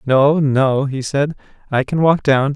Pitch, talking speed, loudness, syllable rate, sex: 140 Hz, 190 wpm, -16 LUFS, 3.9 syllables/s, male